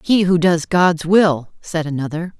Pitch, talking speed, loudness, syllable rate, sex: 170 Hz, 175 wpm, -17 LUFS, 4.1 syllables/s, female